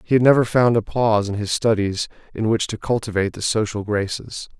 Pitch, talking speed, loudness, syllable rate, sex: 110 Hz, 210 wpm, -20 LUFS, 5.8 syllables/s, male